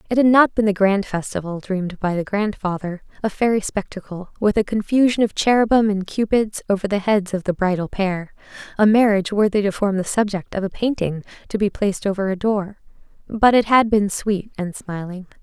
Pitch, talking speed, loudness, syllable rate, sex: 200 Hz, 200 wpm, -20 LUFS, 5.5 syllables/s, female